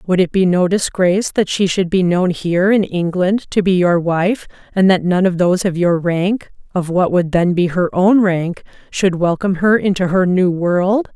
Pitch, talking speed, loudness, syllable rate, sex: 185 Hz, 205 wpm, -15 LUFS, 4.7 syllables/s, female